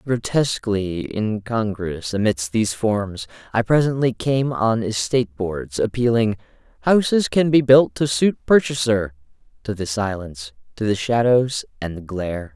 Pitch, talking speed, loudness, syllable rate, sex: 110 Hz, 135 wpm, -20 LUFS, 4.5 syllables/s, male